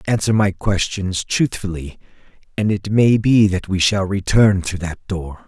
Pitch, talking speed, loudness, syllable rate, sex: 95 Hz, 165 wpm, -18 LUFS, 4.2 syllables/s, male